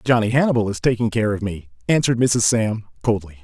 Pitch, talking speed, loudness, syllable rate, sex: 110 Hz, 190 wpm, -20 LUFS, 6.2 syllables/s, male